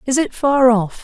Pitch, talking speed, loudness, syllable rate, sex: 255 Hz, 235 wpm, -15 LUFS, 4.4 syllables/s, female